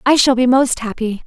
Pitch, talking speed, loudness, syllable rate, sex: 250 Hz, 235 wpm, -15 LUFS, 5.2 syllables/s, female